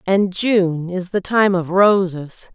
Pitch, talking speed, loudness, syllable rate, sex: 185 Hz, 165 wpm, -17 LUFS, 3.4 syllables/s, female